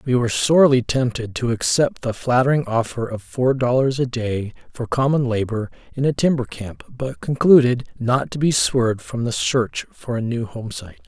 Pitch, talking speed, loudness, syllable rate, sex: 125 Hz, 185 wpm, -20 LUFS, 5.1 syllables/s, male